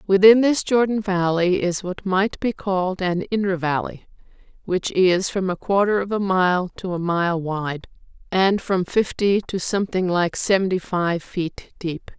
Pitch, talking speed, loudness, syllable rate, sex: 185 Hz, 165 wpm, -21 LUFS, 4.3 syllables/s, female